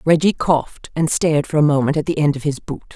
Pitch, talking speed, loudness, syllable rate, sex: 150 Hz, 265 wpm, -18 LUFS, 6.3 syllables/s, female